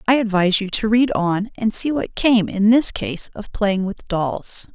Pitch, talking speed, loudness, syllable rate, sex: 210 Hz, 215 wpm, -19 LUFS, 4.3 syllables/s, female